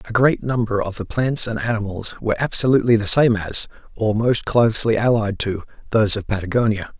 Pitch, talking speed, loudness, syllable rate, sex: 110 Hz, 180 wpm, -19 LUFS, 5.8 syllables/s, male